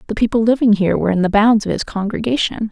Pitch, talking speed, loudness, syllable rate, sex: 215 Hz, 245 wpm, -16 LUFS, 7.2 syllables/s, female